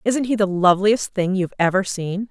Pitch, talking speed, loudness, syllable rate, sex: 195 Hz, 210 wpm, -19 LUFS, 5.6 syllables/s, female